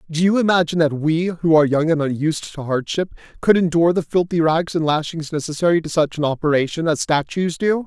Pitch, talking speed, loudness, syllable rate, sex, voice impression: 165 Hz, 205 wpm, -19 LUFS, 6.1 syllables/s, male, masculine, middle-aged, tensed, powerful, bright, clear, fluent, cool, friendly, reassuring, wild, lively, slightly intense, slightly sharp